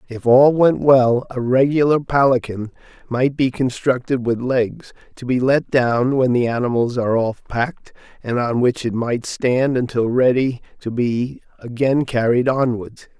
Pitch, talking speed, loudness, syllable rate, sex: 125 Hz, 160 wpm, -18 LUFS, 4.3 syllables/s, male